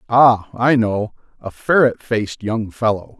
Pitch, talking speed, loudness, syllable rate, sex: 115 Hz, 130 wpm, -17 LUFS, 4.1 syllables/s, male